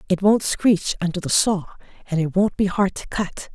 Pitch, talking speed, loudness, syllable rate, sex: 185 Hz, 220 wpm, -21 LUFS, 4.7 syllables/s, female